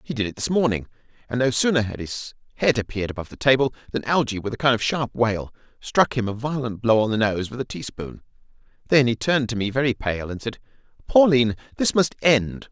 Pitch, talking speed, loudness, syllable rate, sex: 120 Hz, 220 wpm, -22 LUFS, 6.1 syllables/s, male